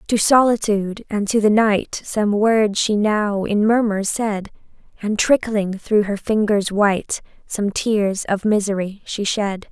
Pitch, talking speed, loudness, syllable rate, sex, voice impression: 210 Hz, 155 wpm, -19 LUFS, 3.9 syllables/s, female, feminine, slightly young, tensed, weak, soft, slightly raspy, slightly cute, calm, friendly, reassuring, kind, slightly modest